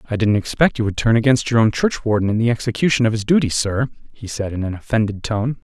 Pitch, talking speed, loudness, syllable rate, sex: 115 Hz, 240 wpm, -18 LUFS, 6.4 syllables/s, male